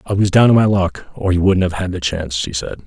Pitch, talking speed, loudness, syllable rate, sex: 90 Hz, 315 wpm, -16 LUFS, 6.3 syllables/s, male